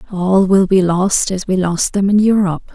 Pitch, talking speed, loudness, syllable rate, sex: 190 Hz, 220 wpm, -14 LUFS, 4.8 syllables/s, female